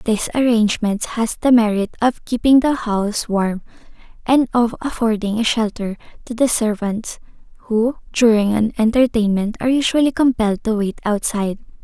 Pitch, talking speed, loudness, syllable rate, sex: 225 Hz, 140 wpm, -18 LUFS, 5.1 syllables/s, female